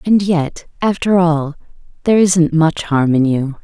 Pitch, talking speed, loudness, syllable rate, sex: 165 Hz, 165 wpm, -15 LUFS, 4.1 syllables/s, female